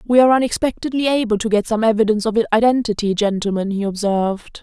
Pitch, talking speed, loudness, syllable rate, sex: 220 Hz, 170 wpm, -18 LUFS, 6.6 syllables/s, female